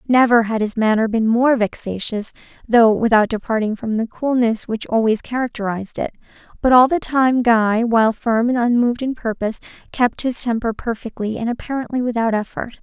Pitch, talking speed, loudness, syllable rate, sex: 230 Hz, 170 wpm, -18 LUFS, 5.4 syllables/s, female